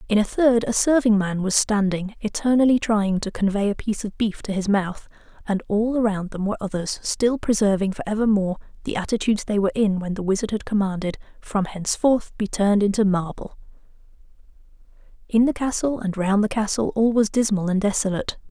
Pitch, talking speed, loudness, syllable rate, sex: 205 Hz, 185 wpm, -22 LUFS, 5.8 syllables/s, female